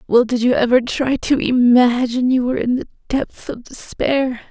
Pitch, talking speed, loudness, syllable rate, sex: 250 Hz, 185 wpm, -17 LUFS, 4.9 syllables/s, female